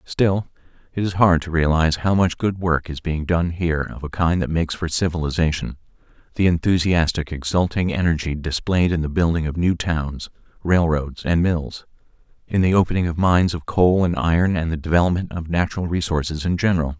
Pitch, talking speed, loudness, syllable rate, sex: 85 Hz, 180 wpm, -20 LUFS, 5.6 syllables/s, male